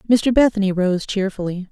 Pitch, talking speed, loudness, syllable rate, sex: 200 Hz, 140 wpm, -18 LUFS, 5.4 syllables/s, female